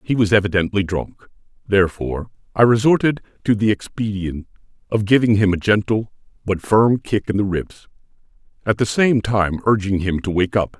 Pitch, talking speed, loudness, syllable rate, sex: 105 Hz, 165 wpm, -18 LUFS, 5.3 syllables/s, male